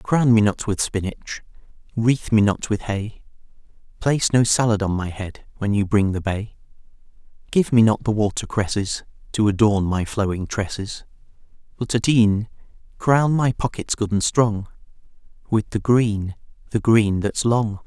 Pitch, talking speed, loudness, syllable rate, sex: 110 Hz, 160 wpm, -21 LUFS, 4.6 syllables/s, male